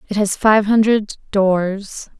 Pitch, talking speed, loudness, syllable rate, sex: 205 Hz, 135 wpm, -16 LUFS, 3.3 syllables/s, female